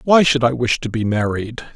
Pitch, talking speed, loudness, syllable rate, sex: 125 Hz, 240 wpm, -18 LUFS, 5.2 syllables/s, male